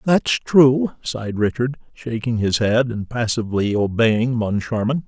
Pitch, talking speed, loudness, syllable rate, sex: 120 Hz, 130 wpm, -19 LUFS, 4.3 syllables/s, male